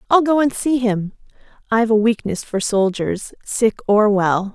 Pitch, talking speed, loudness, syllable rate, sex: 220 Hz, 170 wpm, -18 LUFS, 4.5 syllables/s, female